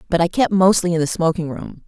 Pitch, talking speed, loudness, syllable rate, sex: 170 Hz, 255 wpm, -18 LUFS, 6.0 syllables/s, female